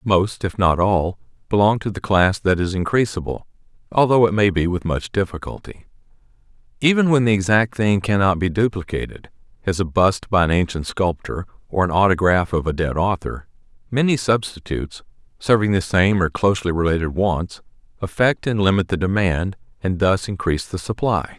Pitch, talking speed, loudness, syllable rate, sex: 95 Hz, 165 wpm, -19 LUFS, 5.3 syllables/s, male